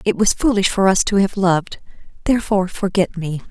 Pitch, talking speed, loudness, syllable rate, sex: 195 Hz, 190 wpm, -18 LUFS, 5.9 syllables/s, female